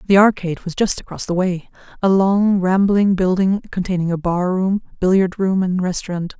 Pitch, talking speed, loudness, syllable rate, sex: 185 Hz, 160 wpm, -18 LUFS, 5.1 syllables/s, female